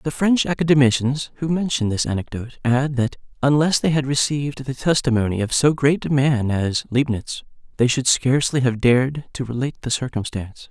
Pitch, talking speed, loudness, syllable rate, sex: 130 Hz, 175 wpm, -20 LUFS, 5.5 syllables/s, male